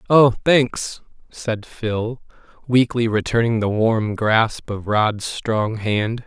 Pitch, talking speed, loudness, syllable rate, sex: 115 Hz, 125 wpm, -20 LUFS, 3.1 syllables/s, male